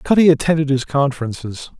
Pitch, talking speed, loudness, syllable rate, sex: 140 Hz, 135 wpm, -17 LUFS, 6.1 syllables/s, male